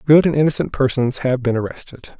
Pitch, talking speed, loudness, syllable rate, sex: 135 Hz, 190 wpm, -18 LUFS, 5.8 syllables/s, male